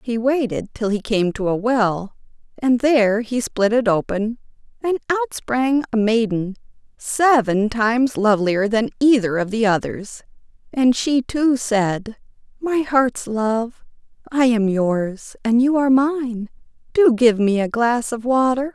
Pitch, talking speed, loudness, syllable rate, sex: 235 Hz, 155 wpm, -19 LUFS, 4.0 syllables/s, female